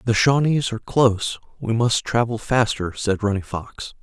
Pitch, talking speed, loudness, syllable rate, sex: 115 Hz, 165 wpm, -21 LUFS, 4.7 syllables/s, male